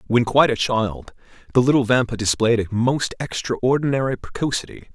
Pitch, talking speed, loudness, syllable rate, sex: 120 Hz, 145 wpm, -20 LUFS, 5.4 syllables/s, male